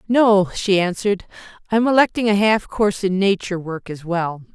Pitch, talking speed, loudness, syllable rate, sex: 195 Hz, 170 wpm, -19 LUFS, 5.3 syllables/s, female